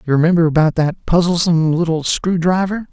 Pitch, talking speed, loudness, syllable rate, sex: 170 Hz, 145 wpm, -15 LUFS, 6.0 syllables/s, male